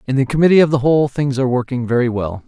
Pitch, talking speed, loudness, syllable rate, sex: 130 Hz, 265 wpm, -16 LUFS, 7.3 syllables/s, male